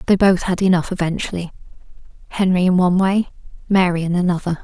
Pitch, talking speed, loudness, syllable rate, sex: 180 Hz, 155 wpm, -18 LUFS, 6.4 syllables/s, female